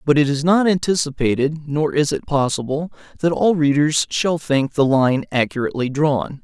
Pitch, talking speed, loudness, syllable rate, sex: 150 Hz, 170 wpm, -18 LUFS, 4.9 syllables/s, male